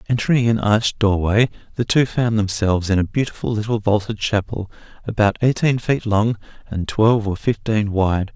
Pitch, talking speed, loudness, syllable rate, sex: 105 Hz, 170 wpm, -19 LUFS, 5.3 syllables/s, male